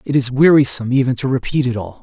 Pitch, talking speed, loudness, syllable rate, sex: 125 Hz, 235 wpm, -15 LUFS, 6.7 syllables/s, male